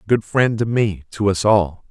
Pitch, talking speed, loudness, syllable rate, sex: 100 Hz, 250 wpm, -18 LUFS, 4.6 syllables/s, male